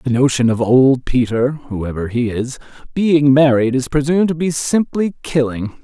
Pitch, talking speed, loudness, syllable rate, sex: 135 Hz, 165 wpm, -16 LUFS, 4.3 syllables/s, male